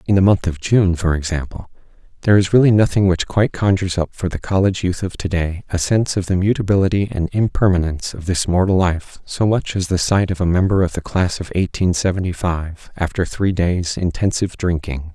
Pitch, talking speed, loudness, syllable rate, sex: 90 Hz, 205 wpm, -18 LUFS, 5.8 syllables/s, male